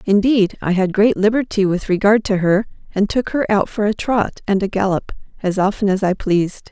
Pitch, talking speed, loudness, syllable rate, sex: 200 Hz, 215 wpm, -17 LUFS, 5.3 syllables/s, female